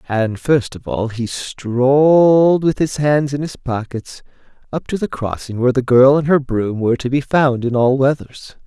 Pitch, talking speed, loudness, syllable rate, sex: 130 Hz, 200 wpm, -16 LUFS, 4.4 syllables/s, male